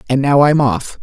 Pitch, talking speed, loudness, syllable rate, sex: 135 Hz, 235 wpm, -13 LUFS, 4.7 syllables/s, female